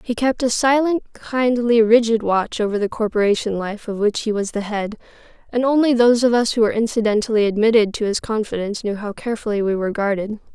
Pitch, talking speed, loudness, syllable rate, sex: 220 Hz, 200 wpm, -19 LUFS, 6.1 syllables/s, female